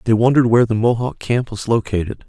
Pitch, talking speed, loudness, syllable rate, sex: 115 Hz, 210 wpm, -17 LUFS, 6.6 syllables/s, male